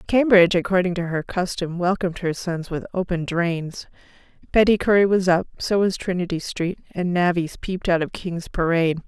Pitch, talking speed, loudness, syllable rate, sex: 180 Hz, 165 wpm, -21 LUFS, 5.3 syllables/s, female